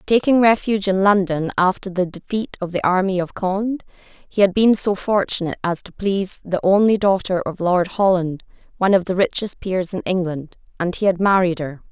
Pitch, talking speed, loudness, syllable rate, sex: 190 Hz, 190 wpm, -19 LUFS, 5.3 syllables/s, female